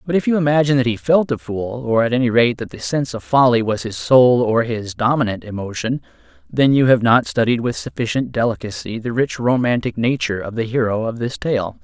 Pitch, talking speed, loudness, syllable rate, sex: 120 Hz, 220 wpm, -18 LUFS, 5.7 syllables/s, male